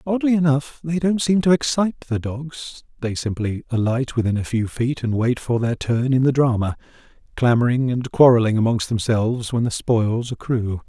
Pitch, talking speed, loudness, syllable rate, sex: 125 Hz, 180 wpm, -20 LUFS, 5.0 syllables/s, male